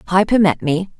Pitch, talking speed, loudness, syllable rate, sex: 185 Hz, 180 wpm, -16 LUFS, 5.1 syllables/s, female